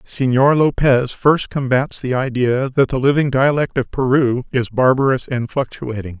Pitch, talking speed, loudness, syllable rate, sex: 130 Hz, 155 wpm, -17 LUFS, 4.5 syllables/s, male